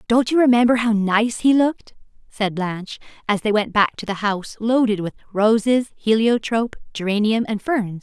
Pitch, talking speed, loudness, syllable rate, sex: 220 Hz, 170 wpm, -19 LUFS, 5.1 syllables/s, female